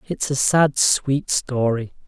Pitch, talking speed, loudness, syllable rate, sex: 135 Hz, 145 wpm, -19 LUFS, 3.3 syllables/s, male